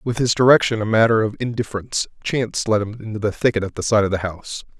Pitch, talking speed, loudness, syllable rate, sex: 110 Hz, 240 wpm, -19 LUFS, 6.8 syllables/s, male